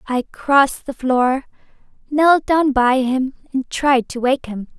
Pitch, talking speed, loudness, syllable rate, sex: 265 Hz, 165 wpm, -17 LUFS, 3.8 syllables/s, female